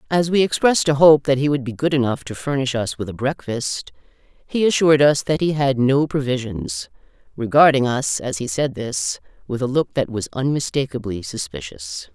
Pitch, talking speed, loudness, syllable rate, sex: 135 Hz, 190 wpm, -20 LUFS, 5.1 syllables/s, female